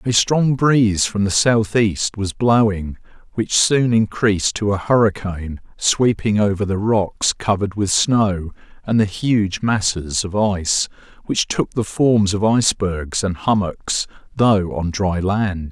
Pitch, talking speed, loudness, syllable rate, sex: 105 Hz, 150 wpm, -18 LUFS, 4.0 syllables/s, male